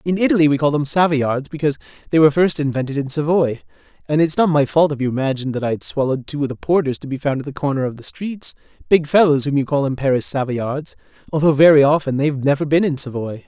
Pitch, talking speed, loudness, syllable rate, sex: 145 Hz, 245 wpm, -18 LUFS, 6.8 syllables/s, male